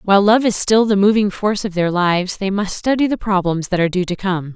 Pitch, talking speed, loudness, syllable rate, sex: 195 Hz, 265 wpm, -17 LUFS, 6.0 syllables/s, female